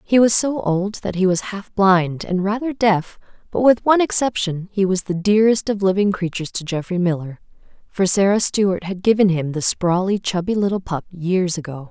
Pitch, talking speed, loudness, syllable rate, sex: 195 Hz, 195 wpm, -19 LUFS, 5.1 syllables/s, female